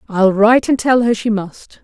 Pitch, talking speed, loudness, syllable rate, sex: 220 Hz, 230 wpm, -14 LUFS, 4.8 syllables/s, female